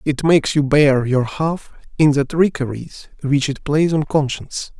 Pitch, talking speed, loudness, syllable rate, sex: 145 Hz, 175 wpm, -17 LUFS, 4.4 syllables/s, male